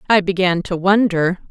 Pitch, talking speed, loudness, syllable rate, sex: 185 Hz, 160 wpm, -17 LUFS, 4.8 syllables/s, female